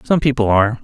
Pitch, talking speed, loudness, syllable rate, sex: 120 Hz, 215 wpm, -15 LUFS, 6.9 syllables/s, male